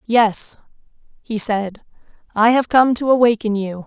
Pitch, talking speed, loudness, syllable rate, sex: 225 Hz, 140 wpm, -17 LUFS, 4.2 syllables/s, female